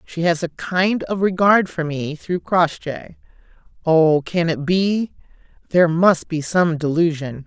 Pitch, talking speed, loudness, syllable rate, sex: 170 Hz, 145 wpm, -19 LUFS, 4.0 syllables/s, female